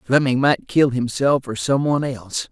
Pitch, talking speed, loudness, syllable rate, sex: 130 Hz, 190 wpm, -19 LUFS, 5.1 syllables/s, male